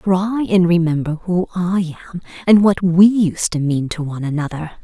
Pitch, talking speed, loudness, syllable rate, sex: 175 Hz, 185 wpm, -17 LUFS, 4.7 syllables/s, female